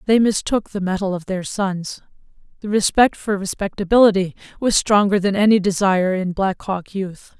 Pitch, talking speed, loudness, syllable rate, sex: 195 Hz, 160 wpm, -19 LUFS, 5.0 syllables/s, female